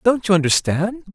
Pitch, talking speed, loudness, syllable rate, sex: 190 Hz, 155 wpm, -18 LUFS, 5.3 syllables/s, male